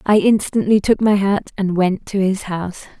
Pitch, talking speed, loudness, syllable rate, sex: 195 Hz, 200 wpm, -17 LUFS, 4.8 syllables/s, female